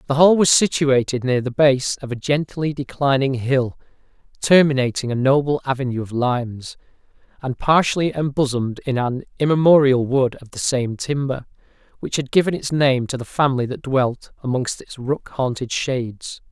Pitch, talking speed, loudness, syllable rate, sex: 135 Hz, 160 wpm, -19 LUFS, 5.0 syllables/s, male